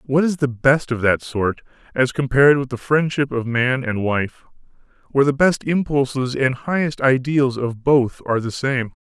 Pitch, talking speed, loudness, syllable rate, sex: 130 Hz, 185 wpm, -19 LUFS, 4.7 syllables/s, male